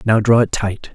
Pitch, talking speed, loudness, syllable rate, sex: 110 Hz, 255 wpm, -16 LUFS, 4.7 syllables/s, male